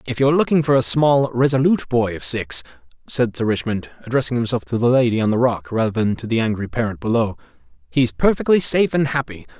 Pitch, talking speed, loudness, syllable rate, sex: 120 Hz, 215 wpm, -19 LUFS, 6.3 syllables/s, male